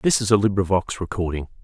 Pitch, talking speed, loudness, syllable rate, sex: 95 Hz, 185 wpm, -21 LUFS, 6.2 syllables/s, male